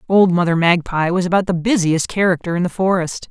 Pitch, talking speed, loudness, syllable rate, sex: 180 Hz, 200 wpm, -17 LUFS, 5.8 syllables/s, female